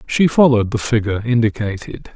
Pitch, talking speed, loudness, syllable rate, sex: 115 Hz, 140 wpm, -16 LUFS, 6.0 syllables/s, male